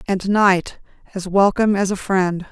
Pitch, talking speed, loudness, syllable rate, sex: 195 Hz, 165 wpm, -18 LUFS, 4.5 syllables/s, female